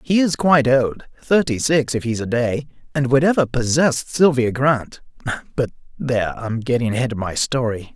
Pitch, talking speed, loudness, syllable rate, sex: 130 Hz, 160 wpm, -19 LUFS, 5.1 syllables/s, male